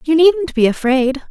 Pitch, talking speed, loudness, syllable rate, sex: 295 Hz, 185 wpm, -14 LUFS, 4.4 syllables/s, female